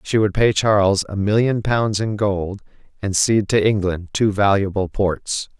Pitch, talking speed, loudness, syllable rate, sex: 100 Hz, 170 wpm, -19 LUFS, 4.5 syllables/s, male